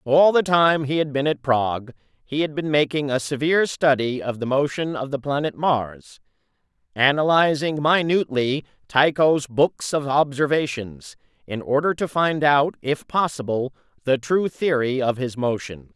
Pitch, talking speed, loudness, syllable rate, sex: 140 Hz, 155 wpm, -21 LUFS, 4.6 syllables/s, male